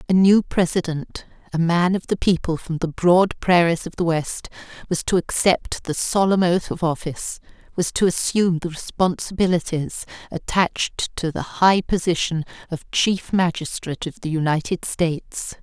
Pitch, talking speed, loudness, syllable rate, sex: 170 Hz, 155 wpm, -21 LUFS, 4.7 syllables/s, female